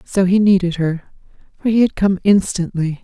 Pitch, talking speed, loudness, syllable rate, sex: 185 Hz, 180 wpm, -16 LUFS, 4.8 syllables/s, female